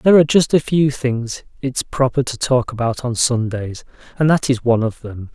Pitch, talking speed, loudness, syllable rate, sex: 125 Hz, 215 wpm, -18 LUFS, 5.2 syllables/s, male